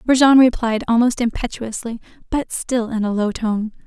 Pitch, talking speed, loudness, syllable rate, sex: 235 Hz, 155 wpm, -18 LUFS, 4.9 syllables/s, female